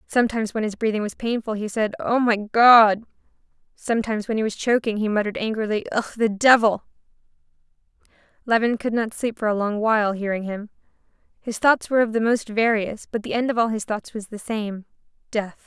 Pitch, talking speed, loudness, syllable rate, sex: 220 Hz, 190 wpm, -21 LUFS, 5.8 syllables/s, female